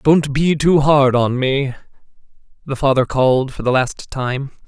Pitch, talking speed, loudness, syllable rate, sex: 135 Hz, 165 wpm, -16 LUFS, 4.3 syllables/s, male